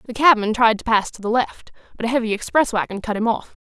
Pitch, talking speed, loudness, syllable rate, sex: 225 Hz, 265 wpm, -19 LUFS, 6.4 syllables/s, female